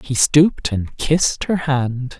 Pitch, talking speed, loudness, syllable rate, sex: 135 Hz, 165 wpm, -18 LUFS, 3.8 syllables/s, male